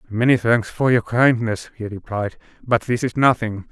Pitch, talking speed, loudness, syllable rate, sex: 115 Hz, 180 wpm, -19 LUFS, 4.6 syllables/s, male